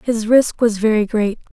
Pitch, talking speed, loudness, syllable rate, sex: 220 Hz, 195 wpm, -16 LUFS, 4.6 syllables/s, female